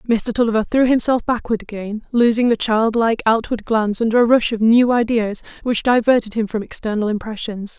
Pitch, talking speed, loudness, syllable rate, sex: 225 Hz, 175 wpm, -18 LUFS, 5.7 syllables/s, female